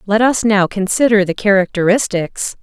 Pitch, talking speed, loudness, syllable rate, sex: 205 Hz, 135 wpm, -14 LUFS, 4.9 syllables/s, female